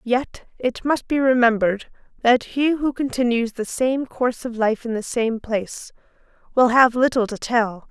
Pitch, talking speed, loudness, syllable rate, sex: 240 Hz, 175 wpm, -20 LUFS, 4.6 syllables/s, female